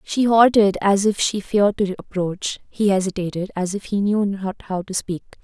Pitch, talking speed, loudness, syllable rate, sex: 195 Hz, 190 wpm, -20 LUFS, 4.7 syllables/s, female